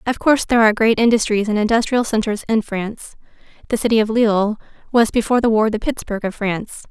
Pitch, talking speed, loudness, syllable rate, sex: 220 Hz, 200 wpm, -17 LUFS, 6.5 syllables/s, female